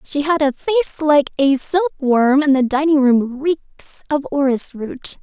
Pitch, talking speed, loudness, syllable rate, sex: 285 Hz, 170 wpm, -17 LUFS, 4.3 syllables/s, female